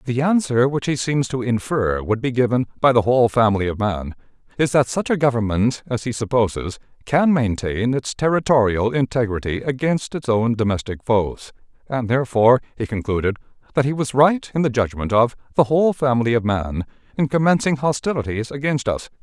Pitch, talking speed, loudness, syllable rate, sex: 125 Hz, 175 wpm, -20 LUFS, 5.5 syllables/s, male